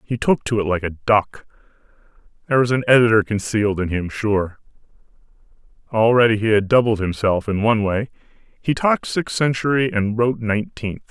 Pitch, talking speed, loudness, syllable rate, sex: 110 Hz, 160 wpm, -19 LUFS, 5.7 syllables/s, male